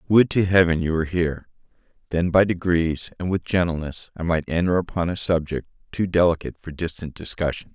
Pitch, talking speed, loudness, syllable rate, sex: 85 Hz, 170 wpm, -22 LUFS, 5.8 syllables/s, male